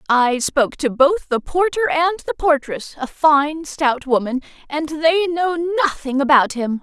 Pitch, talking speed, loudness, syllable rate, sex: 300 Hz, 165 wpm, -18 LUFS, 4.4 syllables/s, female